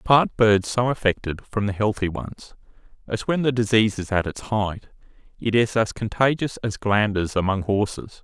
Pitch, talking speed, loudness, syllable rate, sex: 110 Hz, 175 wpm, -22 LUFS, 4.8 syllables/s, male